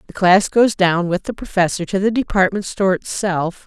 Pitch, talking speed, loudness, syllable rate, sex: 190 Hz, 195 wpm, -17 LUFS, 5.3 syllables/s, female